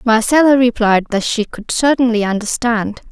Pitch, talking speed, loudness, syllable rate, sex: 230 Hz, 135 wpm, -14 LUFS, 4.9 syllables/s, female